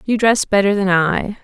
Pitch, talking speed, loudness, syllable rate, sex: 200 Hz, 210 wpm, -15 LUFS, 4.7 syllables/s, female